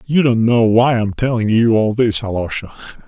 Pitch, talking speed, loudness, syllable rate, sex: 115 Hz, 215 wpm, -15 LUFS, 5.3 syllables/s, male